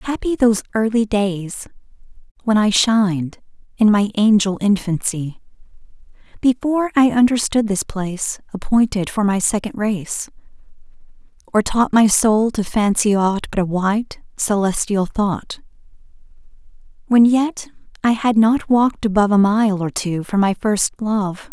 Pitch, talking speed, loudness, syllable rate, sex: 210 Hz, 135 wpm, -17 LUFS, 4.4 syllables/s, female